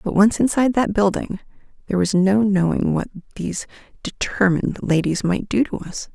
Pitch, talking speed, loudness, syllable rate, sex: 190 Hz, 165 wpm, -20 LUFS, 5.5 syllables/s, female